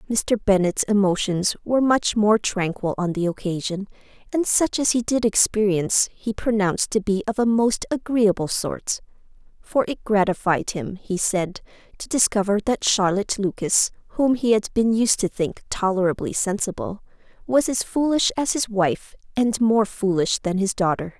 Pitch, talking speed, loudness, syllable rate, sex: 210 Hz, 160 wpm, -21 LUFS, 4.7 syllables/s, female